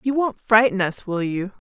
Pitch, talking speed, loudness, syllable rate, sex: 210 Hz, 215 wpm, -21 LUFS, 4.8 syllables/s, female